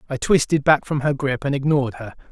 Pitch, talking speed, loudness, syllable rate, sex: 140 Hz, 235 wpm, -20 LUFS, 6.1 syllables/s, male